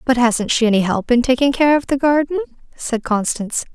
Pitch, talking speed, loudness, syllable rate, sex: 245 Hz, 210 wpm, -17 LUFS, 5.6 syllables/s, female